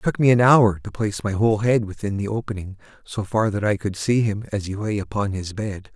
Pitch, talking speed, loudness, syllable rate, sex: 105 Hz, 260 wpm, -22 LUFS, 5.8 syllables/s, male